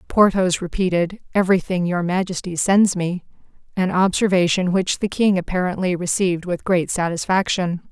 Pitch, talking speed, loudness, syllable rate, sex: 180 Hz, 130 wpm, -20 LUFS, 5.1 syllables/s, female